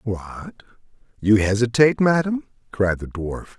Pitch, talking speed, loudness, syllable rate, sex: 115 Hz, 115 wpm, -20 LUFS, 4.4 syllables/s, male